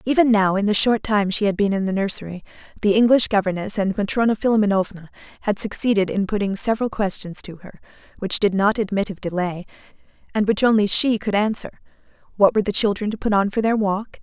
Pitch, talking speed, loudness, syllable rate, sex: 205 Hz, 205 wpm, -20 LUFS, 6.2 syllables/s, female